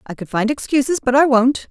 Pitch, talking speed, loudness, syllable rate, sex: 255 Hz, 245 wpm, -17 LUFS, 5.9 syllables/s, female